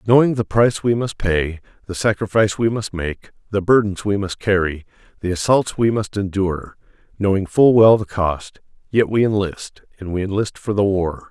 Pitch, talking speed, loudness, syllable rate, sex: 100 Hz, 175 wpm, -19 LUFS, 5.1 syllables/s, male